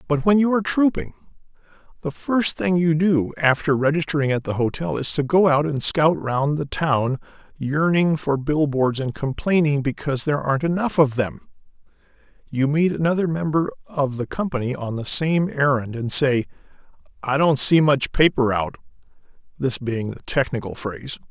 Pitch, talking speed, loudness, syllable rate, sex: 145 Hz, 165 wpm, -21 LUFS, 5.0 syllables/s, male